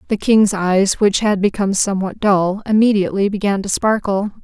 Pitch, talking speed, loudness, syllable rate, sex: 200 Hz, 160 wpm, -16 LUFS, 5.4 syllables/s, female